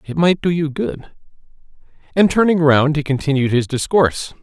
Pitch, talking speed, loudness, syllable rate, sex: 150 Hz, 165 wpm, -17 LUFS, 5.2 syllables/s, male